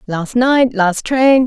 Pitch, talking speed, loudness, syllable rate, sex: 235 Hz, 165 wpm, -14 LUFS, 3.1 syllables/s, female